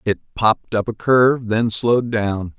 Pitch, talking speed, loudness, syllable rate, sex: 110 Hz, 185 wpm, -18 LUFS, 4.8 syllables/s, male